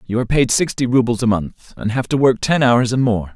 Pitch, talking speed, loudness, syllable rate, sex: 120 Hz, 270 wpm, -17 LUFS, 5.6 syllables/s, male